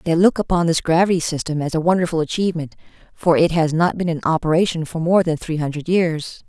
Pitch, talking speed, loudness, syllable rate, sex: 165 Hz, 215 wpm, -19 LUFS, 6.1 syllables/s, female